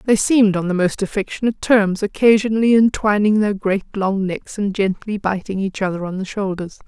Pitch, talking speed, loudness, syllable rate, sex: 200 Hz, 185 wpm, -18 LUFS, 5.4 syllables/s, female